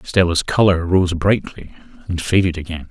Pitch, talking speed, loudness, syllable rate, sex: 90 Hz, 145 wpm, -17 LUFS, 4.8 syllables/s, male